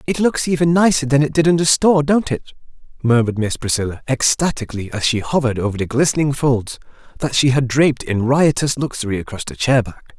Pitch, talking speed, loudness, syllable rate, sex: 135 Hz, 200 wpm, -17 LUFS, 6.2 syllables/s, male